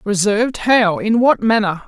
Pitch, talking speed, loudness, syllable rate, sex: 215 Hz, 130 wpm, -15 LUFS, 4.6 syllables/s, female